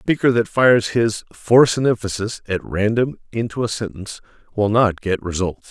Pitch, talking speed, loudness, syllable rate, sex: 110 Hz, 180 wpm, -19 LUFS, 5.5 syllables/s, male